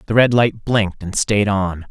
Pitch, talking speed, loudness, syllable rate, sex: 105 Hz, 220 wpm, -17 LUFS, 4.7 syllables/s, male